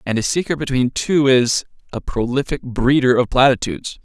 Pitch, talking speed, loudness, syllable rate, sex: 130 Hz, 150 wpm, -17 LUFS, 5.2 syllables/s, male